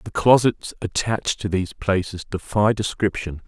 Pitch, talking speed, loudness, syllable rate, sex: 100 Hz, 140 wpm, -22 LUFS, 5.0 syllables/s, male